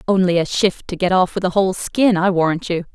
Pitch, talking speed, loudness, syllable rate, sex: 185 Hz, 265 wpm, -18 LUFS, 5.9 syllables/s, female